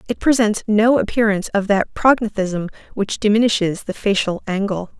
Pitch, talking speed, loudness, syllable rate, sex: 210 Hz, 145 wpm, -18 LUFS, 5.2 syllables/s, female